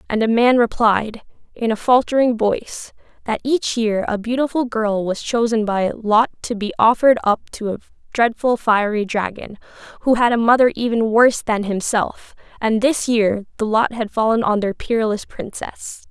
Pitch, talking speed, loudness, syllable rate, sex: 225 Hz, 170 wpm, -18 LUFS, 4.8 syllables/s, female